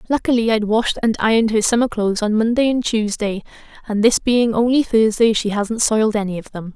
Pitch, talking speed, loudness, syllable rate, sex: 220 Hz, 205 wpm, -17 LUFS, 5.8 syllables/s, female